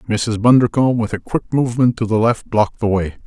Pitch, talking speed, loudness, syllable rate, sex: 115 Hz, 220 wpm, -17 LUFS, 6.4 syllables/s, male